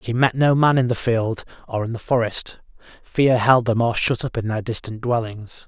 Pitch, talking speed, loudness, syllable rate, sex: 120 Hz, 220 wpm, -20 LUFS, 4.9 syllables/s, male